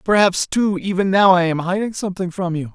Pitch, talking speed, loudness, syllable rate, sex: 185 Hz, 220 wpm, -18 LUFS, 5.7 syllables/s, male